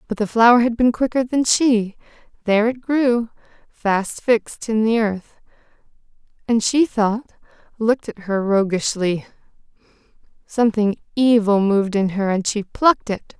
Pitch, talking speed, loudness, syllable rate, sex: 220 Hz, 145 wpm, -19 LUFS, 4.6 syllables/s, female